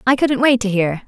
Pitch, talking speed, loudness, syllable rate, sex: 230 Hz, 280 wpm, -16 LUFS, 5.3 syllables/s, female